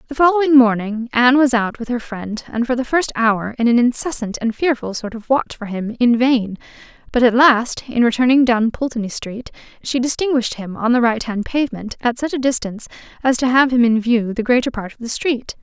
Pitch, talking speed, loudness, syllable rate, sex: 240 Hz, 225 wpm, -17 LUFS, 5.5 syllables/s, female